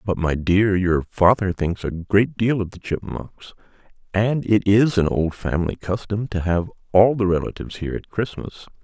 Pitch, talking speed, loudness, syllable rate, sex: 95 Hz, 185 wpm, -21 LUFS, 4.8 syllables/s, male